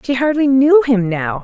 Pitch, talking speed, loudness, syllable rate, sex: 245 Hz, 210 wpm, -13 LUFS, 4.6 syllables/s, female